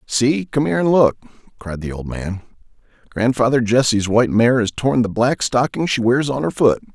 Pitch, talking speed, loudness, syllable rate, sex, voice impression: 120 Hz, 200 wpm, -17 LUFS, 5.2 syllables/s, male, very masculine, very adult-like, slightly old, slightly tensed, slightly powerful, bright, soft, slightly muffled, fluent, slightly raspy, very cool, very intellectual, very sincere, very calm, very mature, very friendly, very reassuring, unique, very elegant, wild, sweet, lively, very kind